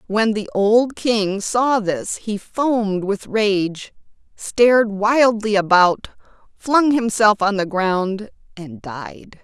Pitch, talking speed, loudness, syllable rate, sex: 210 Hz, 125 wpm, -18 LUFS, 3.1 syllables/s, female